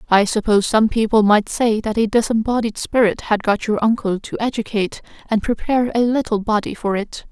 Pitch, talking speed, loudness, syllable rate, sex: 220 Hz, 190 wpm, -18 LUFS, 5.6 syllables/s, female